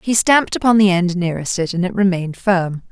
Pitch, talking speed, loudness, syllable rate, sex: 190 Hz, 205 wpm, -16 LUFS, 5.8 syllables/s, female